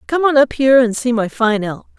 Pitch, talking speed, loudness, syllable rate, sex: 245 Hz, 270 wpm, -15 LUFS, 5.8 syllables/s, female